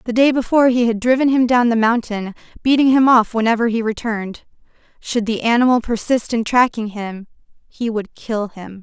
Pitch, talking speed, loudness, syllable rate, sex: 230 Hz, 185 wpm, -17 LUFS, 5.4 syllables/s, female